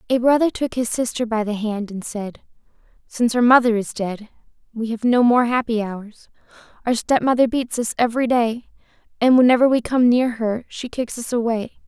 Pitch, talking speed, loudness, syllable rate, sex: 235 Hz, 185 wpm, -19 LUFS, 5.3 syllables/s, female